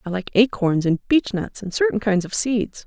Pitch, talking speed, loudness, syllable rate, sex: 205 Hz, 210 wpm, -21 LUFS, 4.9 syllables/s, female